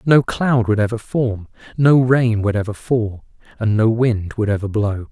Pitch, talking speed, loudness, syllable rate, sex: 115 Hz, 190 wpm, -18 LUFS, 4.3 syllables/s, male